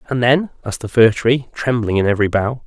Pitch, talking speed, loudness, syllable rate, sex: 120 Hz, 225 wpm, -17 LUFS, 6.1 syllables/s, male